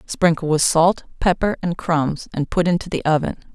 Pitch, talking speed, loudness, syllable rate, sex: 165 Hz, 185 wpm, -19 LUFS, 4.8 syllables/s, female